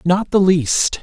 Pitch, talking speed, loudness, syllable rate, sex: 185 Hz, 175 wpm, -15 LUFS, 3.3 syllables/s, male